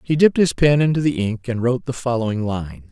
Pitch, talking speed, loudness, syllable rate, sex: 125 Hz, 245 wpm, -19 LUFS, 6.5 syllables/s, male